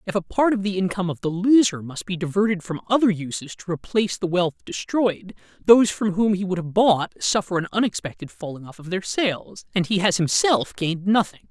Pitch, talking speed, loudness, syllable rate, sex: 190 Hz, 215 wpm, -22 LUFS, 5.6 syllables/s, male